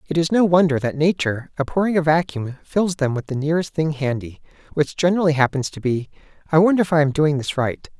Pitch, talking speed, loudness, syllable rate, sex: 155 Hz, 220 wpm, -20 LUFS, 6.2 syllables/s, male